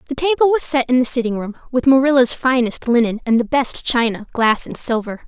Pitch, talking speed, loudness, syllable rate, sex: 250 Hz, 215 wpm, -16 LUFS, 5.7 syllables/s, female